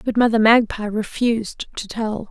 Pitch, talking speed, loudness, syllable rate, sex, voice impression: 220 Hz, 155 wpm, -19 LUFS, 4.7 syllables/s, female, feminine, slightly young, thin, slightly tensed, powerful, bright, soft, slightly raspy, intellectual, calm, friendly, reassuring, slightly lively, kind, slightly modest